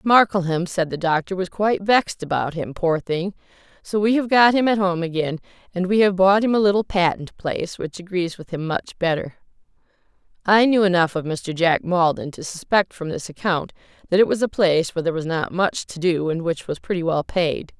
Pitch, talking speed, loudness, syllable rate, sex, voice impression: 180 Hz, 215 wpm, -21 LUFS, 5.5 syllables/s, female, very feminine, slightly gender-neutral, slightly adult-like, slightly thin, very tensed, powerful, bright, very hard, very clear, very fluent, raspy, very cool, slightly intellectual, very refreshing, very sincere, calm, friendly, very reassuring, very unique, elegant, very wild, slightly sweet, lively, very strict, slightly intense, sharp